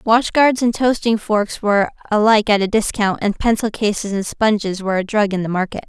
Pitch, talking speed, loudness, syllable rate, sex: 210 Hz, 215 wpm, -17 LUFS, 5.6 syllables/s, female